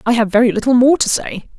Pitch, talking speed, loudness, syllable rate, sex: 235 Hz, 265 wpm, -14 LUFS, 6.4 syllables/s, female